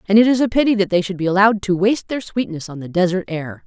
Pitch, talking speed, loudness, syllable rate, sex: 195 Hz, 295 wpm, -18 LUFS, 6.9 syllables/s, female